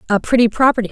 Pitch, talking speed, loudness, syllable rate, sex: 230 Hz, 195 wpm, -15 LUFS, 8.5 syllables/s, female